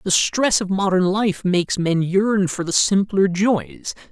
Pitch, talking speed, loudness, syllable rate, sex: 180 Hz, 175 wpm, -19 LUFS, 3.9 syllables/s, male